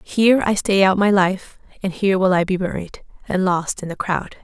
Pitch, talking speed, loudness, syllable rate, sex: 190 Hz, 230 wpm, -18 LUFS, 5.2 syllables/s, female